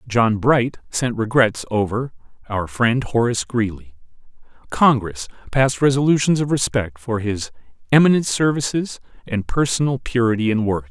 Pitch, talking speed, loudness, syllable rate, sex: 120 Hz, 125 wpm, -19 LUFS, 4.9 syllables/s, male